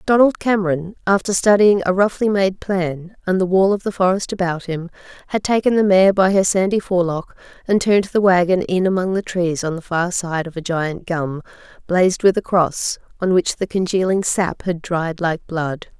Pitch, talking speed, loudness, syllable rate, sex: 185 Hz, 200 wpm, -18 LUFS, 5.0 syllables/s, female